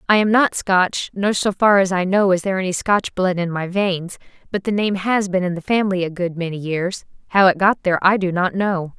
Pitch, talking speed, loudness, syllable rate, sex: 190 Hz, 255 wpm, -18 LUFS, 5.4 syllables/s, female